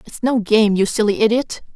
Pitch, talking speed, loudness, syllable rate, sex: 220 Hz, 205 wpm, -17 LUFS, 5.2 syllables/s, female